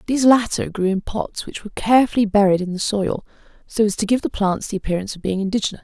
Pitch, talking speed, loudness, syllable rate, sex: 205 Hz, 235 wpm, -20 LUFS, 6.9 syllables/s, female